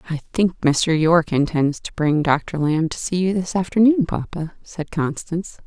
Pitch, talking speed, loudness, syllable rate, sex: 170 Hz, 180 wpm, -20 LUFS, 4.7 syllables/s, female